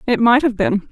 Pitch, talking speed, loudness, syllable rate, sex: 235 Hz, 260 wpm, -15 LUFS, 5.3 syllables/s, female